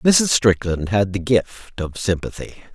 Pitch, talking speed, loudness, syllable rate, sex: 105 Hz, 155 wpm, -19 LUFS, 3.8 syllables/s, male